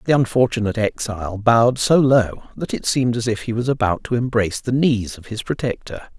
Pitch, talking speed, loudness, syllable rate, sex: 115 Hz, 205 wpm, -19 LUFS, 5.9 syllables/s, male